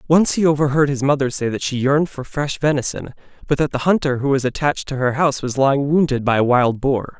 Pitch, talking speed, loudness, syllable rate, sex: 140 Hz, 240 wpm, -18 LUFS, 6.2 syllables/s, male